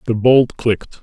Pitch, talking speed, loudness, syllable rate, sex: 115 Hz, 175 wpm, -15 LUFS, 4.7 syllables/s, male